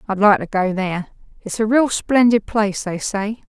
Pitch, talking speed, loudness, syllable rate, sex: 210 Hz, 205 wpm, -18 LUFS, 5.0 syllables/s, female